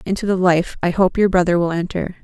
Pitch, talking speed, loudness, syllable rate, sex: 180 Hz, 240 wpm, -18 LUFS, 5.9 syllables/s, female